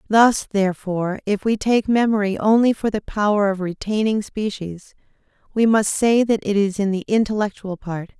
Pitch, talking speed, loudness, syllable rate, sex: 205 Hz, 170 wpm, -20 LUFS, 5.0 syllables/s, female